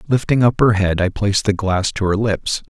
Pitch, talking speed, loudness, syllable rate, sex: 105 Hz, 240 wpm, -17 LUFS, 5.3 syllables/s, male